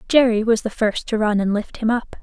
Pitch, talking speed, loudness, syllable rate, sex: 220 Hz, 270 wpm, -20 LUFS, 5.4 syllables/s, female